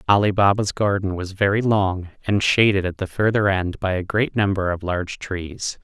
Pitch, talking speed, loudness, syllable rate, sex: 95 Hz, 195 wpm, -21 LUFS, 4.9 syllables/s, male